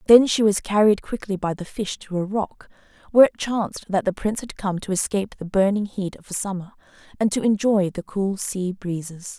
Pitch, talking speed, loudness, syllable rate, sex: 200 Hz, 215 wpm, -22 LUFS, 5.4 syllables/s, female